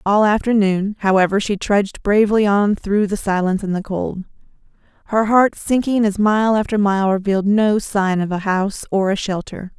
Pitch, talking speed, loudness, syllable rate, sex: 200 Hz, 180 wpm, -17 LUFS, 5.1 syllables/s, female